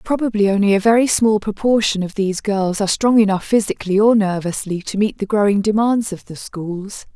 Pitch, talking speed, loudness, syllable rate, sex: 205 Hz, 195 wpm, -17 LUFS, 5.6 syllables/s, female